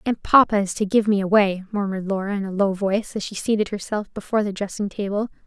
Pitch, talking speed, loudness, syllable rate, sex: 200 Hz, 230 wpm, -22 LUFS, 6.5 syllables/s, female